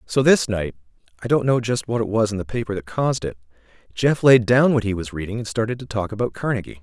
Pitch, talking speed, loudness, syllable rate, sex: 110 Hz, 235 wpm, -21 LUFS, 6.3 syllables/s, male